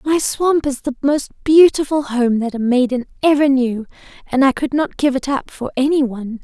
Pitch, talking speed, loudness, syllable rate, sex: 270 Hz, 205 wpm, -17 LUFS, 5.1 syllables/s, female